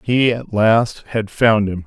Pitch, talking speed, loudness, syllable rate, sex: 110 Hz, 195 wpm, -17 LUFS, 3.6 syllables/s, male